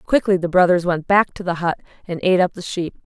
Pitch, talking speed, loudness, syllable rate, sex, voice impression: 180 Hz, 255 wpm, -19 LUFS, 6.3 syllables/s, female, feminine, adult-like, intellectual, slightly calm, elegant, slightly sweet